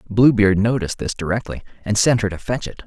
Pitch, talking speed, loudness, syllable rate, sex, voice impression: 110 Hz, 210 wpm, -19 LUFS, 6.2 syllables/s, male, masculine, adult-like, tensed, powerful, bright, clear, slightly nasal, intellectual, friendly, unique, lively, slightly intense